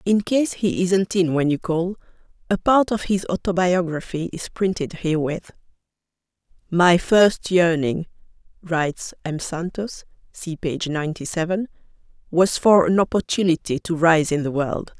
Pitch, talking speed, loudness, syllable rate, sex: 175 Hz, 130 wpm, -21 LUFS, 4.5 syllables/s, female